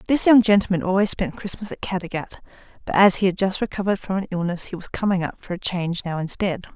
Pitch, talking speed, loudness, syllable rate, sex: 190 Hz, 230 wpm, -22 LUFS, 6.5 syllables/s, female